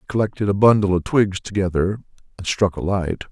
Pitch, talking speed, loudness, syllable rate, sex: 100 Hz, 200 wpm, -20 LUFS, 6.3 syllables/s, male